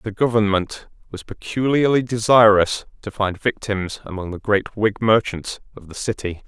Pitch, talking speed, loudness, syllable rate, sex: 105 Hz, 150 wpm, -19 LUFS, 4.6 syllables/s, male